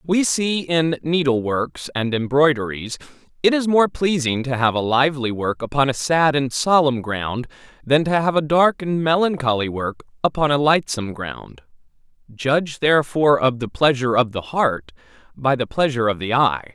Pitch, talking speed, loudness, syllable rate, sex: 140 Hz, 170 wpm, -19 LUFS, 4.9 syllables/s, male